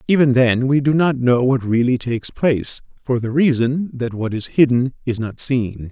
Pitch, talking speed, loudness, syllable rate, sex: 125 Hz, 205 wpm, -18 LUFS, 4.8 syllables/s, male